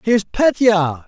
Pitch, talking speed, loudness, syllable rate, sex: 200 Hz, 165 wpm, -16 LUFS, 5.2 syllables/s, male